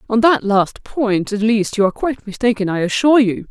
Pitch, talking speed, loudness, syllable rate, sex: 220 Hz, 225 wpm, -16 LUFS, 5.7 syllables/s, female